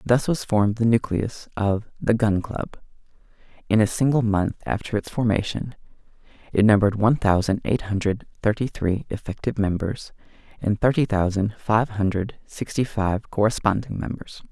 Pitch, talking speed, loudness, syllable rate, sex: 105 Hz, 145 wpm, -23 LUFS, 5.0 syllables/s, male